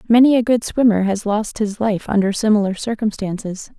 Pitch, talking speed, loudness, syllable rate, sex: 215 Hz, 175 wpm, -18 LUFS, 5.3 syllables/s, female